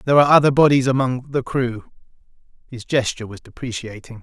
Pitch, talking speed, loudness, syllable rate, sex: 125 Hz, 155 wpm, -18 LUFS, 6.3 syllables/s, male